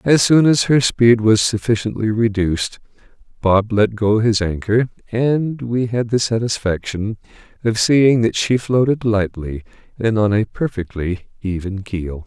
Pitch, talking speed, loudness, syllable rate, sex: 110 Hz, 145 wpm, -17 LUFS, 4.2 syllables/s, male